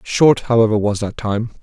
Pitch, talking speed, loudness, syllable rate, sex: 110 Hz, 185 wpm, -16 LUFS, 4.9 syllables/s, male